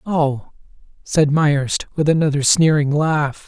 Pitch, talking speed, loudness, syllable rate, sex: 150 Hz, 120 wpm, -17 LUFS, 3.6 syllables/s, male